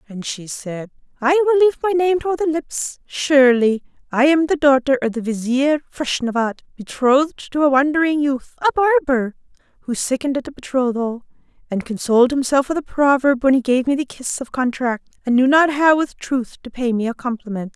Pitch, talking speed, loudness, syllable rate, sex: 265 Hz, 190 wpm, -18 LUFS, 5.6 syllables/s, female